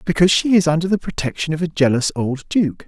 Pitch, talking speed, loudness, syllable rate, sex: 160 Hz, 230 wpm, -18 LUFS, 6.2 syllables/s, male